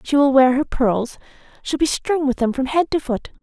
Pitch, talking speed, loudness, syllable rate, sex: 270 Hz, 230 wpm, -19 LUFS, 5.1 syllables/s, female